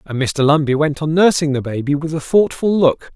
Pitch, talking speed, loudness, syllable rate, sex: 150 Hz, 230 wpm, -16 LUFS, 5.3 syllables/s, male